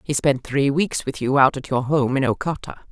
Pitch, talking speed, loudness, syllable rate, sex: 135 Hz, 245 wpm, -21 LUFS, 5.2 syllables/s, female